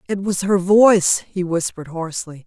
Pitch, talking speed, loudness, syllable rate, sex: 180 Hz, 170 wpm, -18 LUFS, 5.4 syllables/s, female